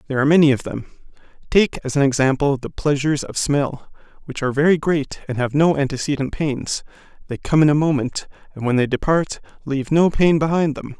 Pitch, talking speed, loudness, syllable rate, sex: 145 Hz, 195 wpm, -19 LUFS, 5.9 syllables/s, male